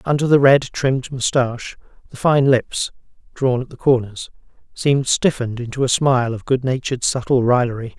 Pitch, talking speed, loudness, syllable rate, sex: 130 Hz, 160 wpm, -18 LUFS, 5.5 syllables/s, male